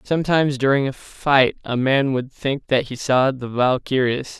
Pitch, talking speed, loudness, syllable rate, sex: 135 Hz, 180 wpm, -20 LUFS, 4.5 syllables/s, male